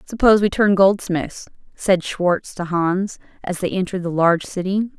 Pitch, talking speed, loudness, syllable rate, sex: 190 Hz, 170 wpm, -19 LUFS, 4.9 syllables/s, female